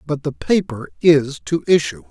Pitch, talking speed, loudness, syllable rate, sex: 155 Hz, 170 wpm, -18 LUFS, 4.5 syllables/s, male